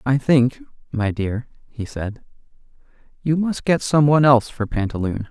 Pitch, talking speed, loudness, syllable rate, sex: 130 Hz, 145 wpm, -20 LUFS, 4.9 syllables/s, male